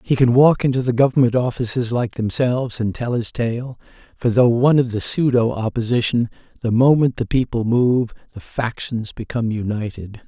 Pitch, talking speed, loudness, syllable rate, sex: 120 Hz, 170 wpm, -19 LUFS, 5.2 syllables/s, male